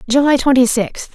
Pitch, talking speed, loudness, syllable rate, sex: 255 Hz, 155 wpm, -14 LUFS, 5.5 syllables/s, female